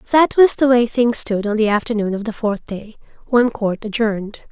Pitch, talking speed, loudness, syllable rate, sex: 225 Hz, 215 wpm, -17 LUFS, 5.1 syllables/s, female